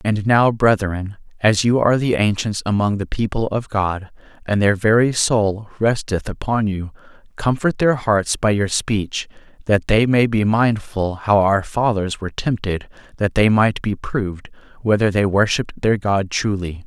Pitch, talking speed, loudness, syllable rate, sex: 105 Hz, 165 wpm, -19 LUFS, 4.4 syllables/s, male